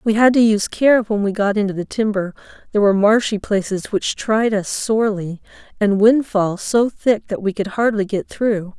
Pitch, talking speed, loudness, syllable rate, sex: 210 Hz, 200 wpm, -18 LUFS, 5.1 syllables/s, female